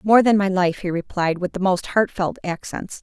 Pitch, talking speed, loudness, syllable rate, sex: 185 Hz, 220 wpm, -21 LUFS, 4.9 syllables/s, female